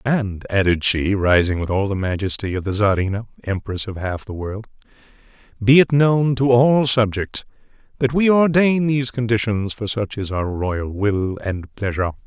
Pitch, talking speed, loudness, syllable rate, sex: 110 Hz, 170 wpm, -19 LUFS, 4.8 syllables/s, male